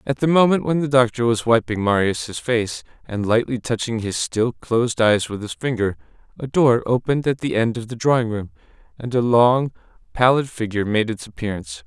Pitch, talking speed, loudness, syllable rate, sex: 120 Hz, 190 wpm, -20 LUFS, 5.4 syllables/s, male